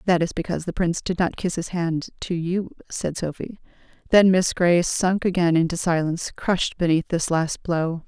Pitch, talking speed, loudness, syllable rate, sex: 175 Hz, 195 wpm, -22 LUFS, 5.0 syllables/s, female